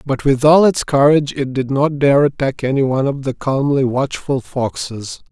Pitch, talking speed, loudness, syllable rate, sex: 135 Hz, 190 wpm, -16 LUFS, 4.9 syllables/s, male